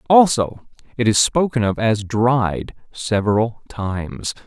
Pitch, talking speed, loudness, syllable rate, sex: 115 Hz, 120 wpm, -19 LUFS, 3.9 syllables/s, male